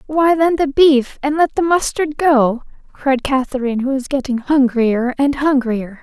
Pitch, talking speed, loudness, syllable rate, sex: 275 Hz, 170 wpm, -16 LUFS, 4.4 syllables/s, female